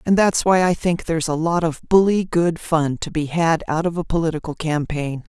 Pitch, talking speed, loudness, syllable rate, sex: 165 Hz, 225 wpm, -20 LUFS, 5.2 syllables/s, female